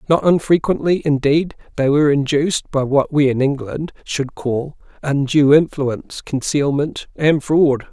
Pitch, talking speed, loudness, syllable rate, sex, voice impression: 145 Hz, 135 wpm, -17 LUFS, 4.4 syllables/s, male, very masculine, very adult-like, middle-aged, thick, tensed, slightly weak, slightly bright, hard, clear, fluent, very cool, intellectual, slightly refreshing, sincere, very calm, mature, friendly, reassuring, slightly unique, very elegant, slightly wild, sweet, slightly lively, kind